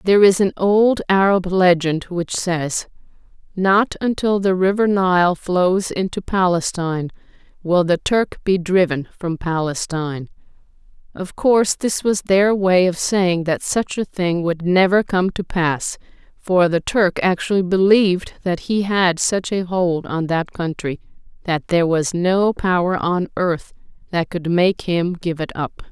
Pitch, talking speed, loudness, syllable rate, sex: 180 Hz, 155 wpm, -18 LUFS, 4.1 syllables/s, female